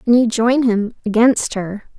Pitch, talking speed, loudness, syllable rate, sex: 225 Hz, 180 wpm, -16 LUFS, 4.3 syllables/s, female